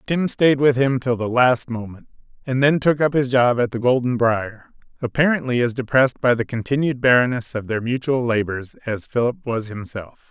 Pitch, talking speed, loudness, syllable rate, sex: 125 Hz, 190 wpm, -19 LUFS, 5.1 syllables/s, male